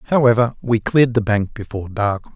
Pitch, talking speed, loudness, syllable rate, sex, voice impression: 115 Hz, 180 wpm, -18 LUFS, 5.2 syllables/s, male, very masculine, very adult-like, middle-aged, thick, tensed, powerful, slightly dark, slightly hard, slightly muffled, fluent, slightly raspy, very cool, very intellectual, slightly refreshing, very sincere, very calm, very mature, very friendly, very reassuring, unique, elegant, wild, sweet, lively, kind, slightly intense